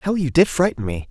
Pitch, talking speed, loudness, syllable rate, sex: 150 Hz, 270 wpm, -19 LUFS, 5.6 syllables/s, male